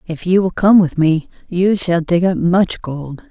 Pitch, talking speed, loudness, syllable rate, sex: 175 Hz, 220 wpm, -15 LUFS, 4.0 syllables/s, female